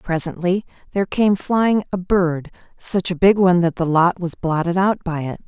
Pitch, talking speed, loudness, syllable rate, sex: 180 Hz, 185 wpm, -19 LUFS, 5.0 syllables/s, female